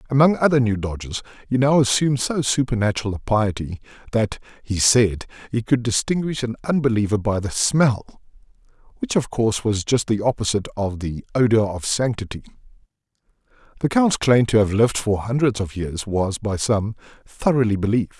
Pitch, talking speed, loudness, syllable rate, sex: 115 Hz, 160 wpm, -20 LUFS, 5.6 syllables/s, male